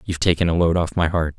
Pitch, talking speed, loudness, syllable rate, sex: 85 Hz, 305 wpm, -20 LUFS, 7.0 syllables/s, male